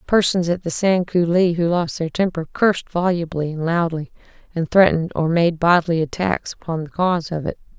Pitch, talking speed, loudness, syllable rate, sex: 170 Hz, 185 wpm, -19 LUFS, 5.4 syllables/s, female